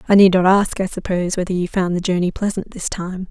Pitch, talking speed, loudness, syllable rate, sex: 185 Hz, 255 wpm, -18 LUFS, 6.1 syllables/s, female